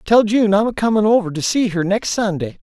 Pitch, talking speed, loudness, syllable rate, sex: 205 Hz, 245 wpm, -17 LUFS, 5.6 syllables/s, male